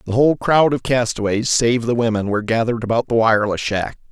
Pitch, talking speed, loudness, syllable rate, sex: 115 Hz, 205 wpm, -18 LUFS, 6.2 syllables/s, male